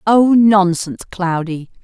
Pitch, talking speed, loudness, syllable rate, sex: 190 Hz, 100 wpm, -14 LUFS, 4.0 syllables/s, female